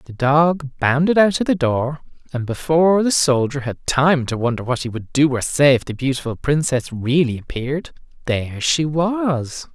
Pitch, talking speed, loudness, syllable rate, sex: 140 Hz, 185 wpm, -18 LUFS, 4.8 syllables/s, male